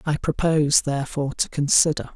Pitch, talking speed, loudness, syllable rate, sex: 150 Hz, 140 wpm, -21 LUFS, 5.9 syllables/s, male